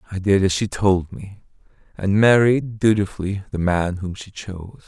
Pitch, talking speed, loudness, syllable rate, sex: 100 Hz, 170 wpm, -19 LUFS, 4.7 syllables/s, male